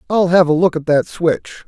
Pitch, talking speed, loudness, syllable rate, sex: 165 Hz, 250 wpm, -15 LUFS, 4.8 syllables/s, male